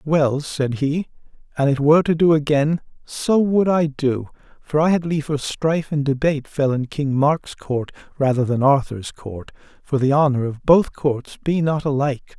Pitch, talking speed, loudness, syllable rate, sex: 145 Hz, 185 wpm, -20 LUFS, 4.6 syllables/s, male